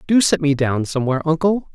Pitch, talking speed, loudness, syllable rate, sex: 155 Hz, 205 wpm, -18 LUFS, 6.3 syllables/s, male